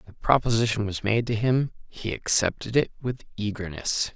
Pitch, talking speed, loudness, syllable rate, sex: 110 Hz, 175 wpm, -25 LUFS, 5.2 syllables/s, male